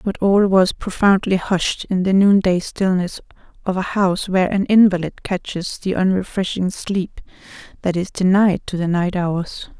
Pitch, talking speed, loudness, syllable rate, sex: 185 Hz, 160 wpm, -18 LUFS, 4.5 syllables/s, female